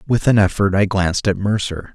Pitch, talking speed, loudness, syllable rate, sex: 100 Hz, 215 wpm, -17 LUFS, 5.5 syllables/s, male